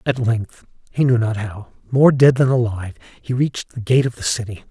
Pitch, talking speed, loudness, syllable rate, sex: 120 Hz, 215 wpm, -18 LUFS, 5.3 syllables/s, male